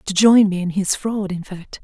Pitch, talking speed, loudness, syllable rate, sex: 195 Hz, 260 wpm, -17 LUFS, 5.1 syllables/s, female